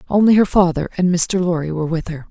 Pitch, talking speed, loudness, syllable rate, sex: 175 Hz, 235 wpm, -17 LUFS, 6.4 syllables/s, female